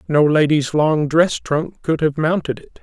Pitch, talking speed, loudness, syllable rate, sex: 155 Hz, 190 wpm, -17 LUFS, 4.2 syllables/s, male